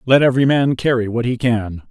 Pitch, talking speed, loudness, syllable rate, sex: 120 Hz, 220 wpm, -17 LUFS, 5.8 syllables/s, male